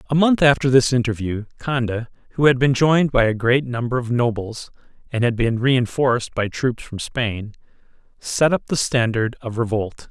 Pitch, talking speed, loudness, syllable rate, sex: 125 Hz, 185 wpm, -20 LUFS, 5.0 syllables/s, male